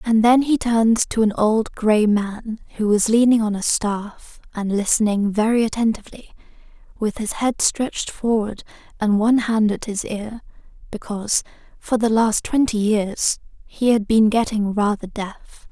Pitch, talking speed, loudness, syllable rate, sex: 220 Hz, 160 wpm, -19 LUFS, 4.5 syllables/s, female